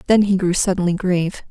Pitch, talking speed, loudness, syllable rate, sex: 185 Hz, 200 wpm, -18 LUFS, 6.3 syllables/s, female